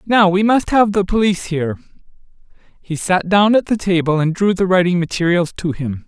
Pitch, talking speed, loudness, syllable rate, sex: 185 Hz, 200 wpm, -16 LUFS, 5.5 syllables/s, male